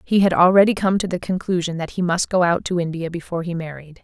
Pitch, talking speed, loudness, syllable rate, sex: 175 Hz, 255 wpm, -19 LUFS, 6.4 syllables/s, female